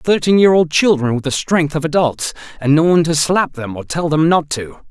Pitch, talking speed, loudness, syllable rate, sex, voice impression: 155 Hz, 235 wpm, -15 LUFS, 5.4 syllables/s, male, masculine, adult-like, tensed, slightly powerful, bright, clear, fluent, intellectual, sincere, calm, slightly wild, slightly strict